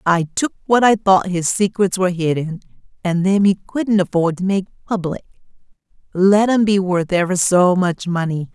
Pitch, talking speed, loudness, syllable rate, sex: 185 Hz, 175 wpm, -17 LUFS, 4.9 syllables/s, female